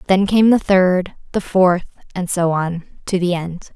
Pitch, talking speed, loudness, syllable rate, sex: 180 Hz, 190 wpm, -17 LUFS, 4.0 syllables/s, female